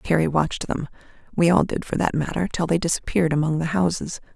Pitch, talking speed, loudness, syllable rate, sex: 165 Hz, 205 wpm, -22 LUFS, 6.1 syllables/s, female